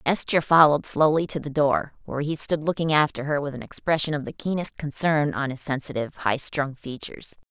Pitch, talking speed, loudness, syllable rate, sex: 150 Hz, 200 wpm, -24 LUFS, 5.7 syllables/s, female